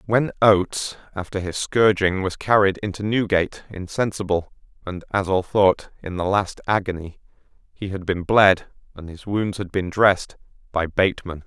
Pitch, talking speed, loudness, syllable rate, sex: 95 Hz, 155 wpm, -21 LUFS, 4.8 syllables/s, male